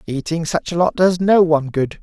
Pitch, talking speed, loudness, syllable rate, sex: 165 Hz, 235 wpm, -17 LUFS, 5.3 syllables/s, male